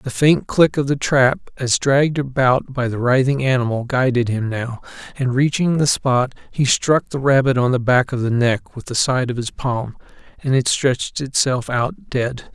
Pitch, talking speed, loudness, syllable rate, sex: 130 Hz, 200 wpm, -18 LUFS, 4.6 syllables/s, male